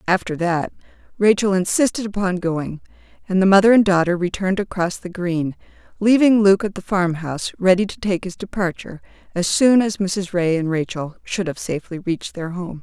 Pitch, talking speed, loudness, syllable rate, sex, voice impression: 185 Hz, 180 wpm, -19 LUFS, 5.4 syllables/s, female, very feminine, middle-aged, slightly thin, tensed, slightly powerful, slightly dark, slightly soft, clear, fluent, slightly raspy, slightly cool, intellectual, refreshing, slightly sincere, calm, slightly friendly, reassuring, slightly unique, slightly elegant, slightly wild, slightly sweet, lively, slightly strict, slightly intense, sharp, slightly light